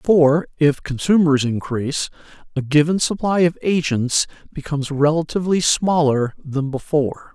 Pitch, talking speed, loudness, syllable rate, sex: 150 Hz, 115 wpm, -19 LUFS, 4.7 syllables/s, male